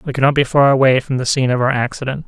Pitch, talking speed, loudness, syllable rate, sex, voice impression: 135 Hz, 290 wpm, -15 LUFS, 7.4 syllables/s, male, masculine, adult-like, slightly powerful, bright, clear, raspy, slightly mature, friendly, unique, wild, lively, slightly kind